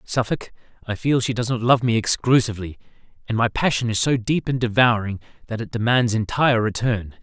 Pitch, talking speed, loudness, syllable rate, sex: 115 Hz, 185 wpm, -21 LUFS, 5.7 syllables/s, male